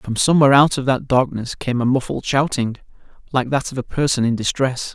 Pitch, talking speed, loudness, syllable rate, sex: 130 Hz, 205 wpm, -18 LUFS, 5.7 syllables/s, male